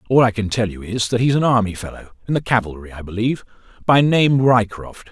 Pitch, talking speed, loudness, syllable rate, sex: 110 Hz, 200 wpm, -18 LUFS, 6.1 syllables/s, male